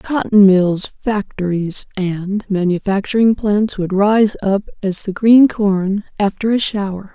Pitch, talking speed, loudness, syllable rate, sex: 200 Hz, 135 wpm, -16 LUFS, 3.9 syllables/s, female